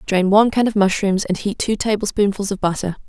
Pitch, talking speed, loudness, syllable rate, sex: 200 Hz, 215 wpm, -18 LUFS, 5.9 syllables/s, female